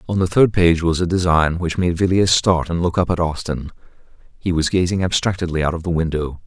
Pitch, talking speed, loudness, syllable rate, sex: 85 Hz, 225 wpm, -18 LUFS, 5.7 syllables/s, male